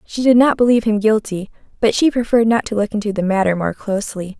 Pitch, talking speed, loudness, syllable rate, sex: 215 Hz, 230 wpm, -16 LUFS, 6.6 syllables/s, female